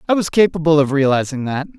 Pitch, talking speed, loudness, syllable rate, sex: 150 Hz, 200 wpm, -16 LUFS, 6.6 syllables/s, male